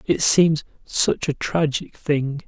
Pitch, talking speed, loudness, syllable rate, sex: 145 Hz, 145 wpm, -21 LUFS, 3.3 syllables/s, male